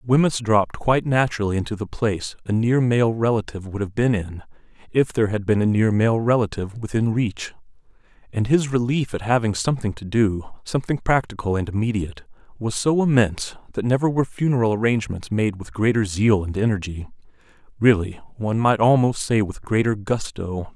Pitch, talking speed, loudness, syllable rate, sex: 110 Hz, 170 wpm, -21 LUFS, 5.7 syllables/s, male